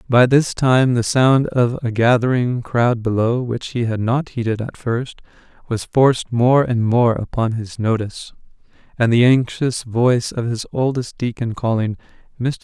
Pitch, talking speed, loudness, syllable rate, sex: 120 Hz, 165 wpm, -18 LUFS, 4.4 syllables/s, male